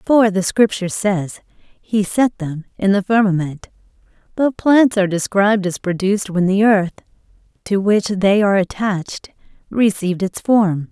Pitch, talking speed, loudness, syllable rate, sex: 200 Hz, 150 wpm, -17 LUFS, 4.6 syllables/s, female